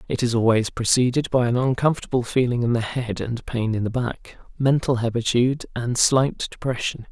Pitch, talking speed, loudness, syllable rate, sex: 120 Hz, 175 wpm, -22 LUFS, 5.3 syllables/s, male